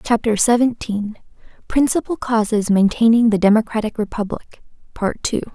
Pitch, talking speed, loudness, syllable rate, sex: 220 Hz, 95 wpm, -18 LUFS, 5.1 syllables/s, female